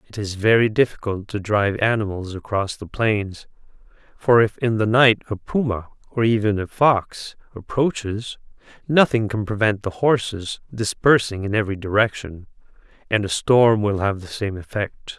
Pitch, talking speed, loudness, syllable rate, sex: 105 Hz, 155 wpm, -20 LUFS, 4.8 syllables/s, male